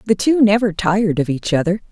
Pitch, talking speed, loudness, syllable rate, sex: 195 Hz, 220 wpm, -16 LUFS, 6.0 syllables/s, female